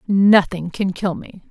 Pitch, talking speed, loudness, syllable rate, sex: 190 Hz, 160 wpm, -18 LUFS, 3.8 syllables/s, female